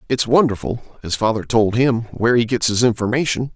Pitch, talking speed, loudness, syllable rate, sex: 115 Hz, 170 wpm, -18 LUFS, 5.4 syllables/s, male